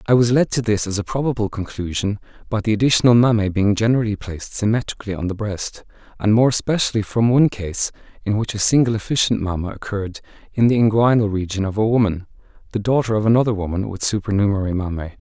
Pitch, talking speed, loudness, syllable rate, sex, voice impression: 105 Hz, 190 wpm, -19 LUFS, 6.6 syllables/s, male, very masculine, very adult-like, very thick, slightly relaxed, slightly weak, slightly dark, soft, slightly muffled, fluent, slightly raspy, cool, intellectual, slightly refreshing, slightly sincere, very calm, slightly mature, slightly friendly, slightly reassuring, slightly unique, slightly elegant, sweet, slightly lively, kind, very modest